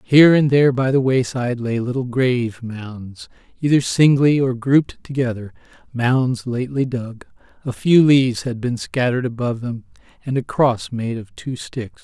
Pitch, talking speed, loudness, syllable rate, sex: 125 Hz, 160 wpm, -18 LUFS, 4.9 syllables/s, male